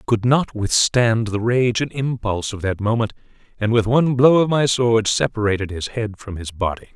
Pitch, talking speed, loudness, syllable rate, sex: 115 Hz, 205 wpm, -19 LUFS, 5.2 syllables/s, male